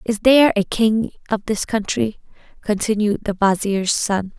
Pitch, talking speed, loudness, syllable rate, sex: 210 Hz, 150 wpm, -19 LUFS, 4.5 syllables/s, female